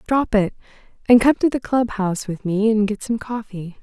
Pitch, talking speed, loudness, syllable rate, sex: 220 Hz, 220 wpm, -19 LUFS, 5.2 syllables/s, female